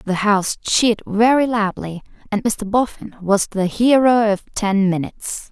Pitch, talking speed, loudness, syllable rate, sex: 210 Hz, 150 wpm, -18 LUFS, 4.5 syllables/s, female